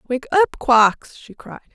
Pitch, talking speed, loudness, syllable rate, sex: 260 Hz, 170 wpm, -16 LUFS, 3.4 syllables/s, female